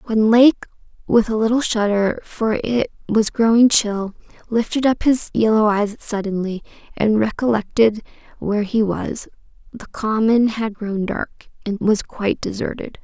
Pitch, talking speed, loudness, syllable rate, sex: 220 Hz, 145 wpm, -19 LUFS, 4.4 syllables/s, female